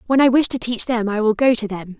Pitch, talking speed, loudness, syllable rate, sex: 230 Hz, 330 wpm, -18 LUFS, 6.0 syllables/s, female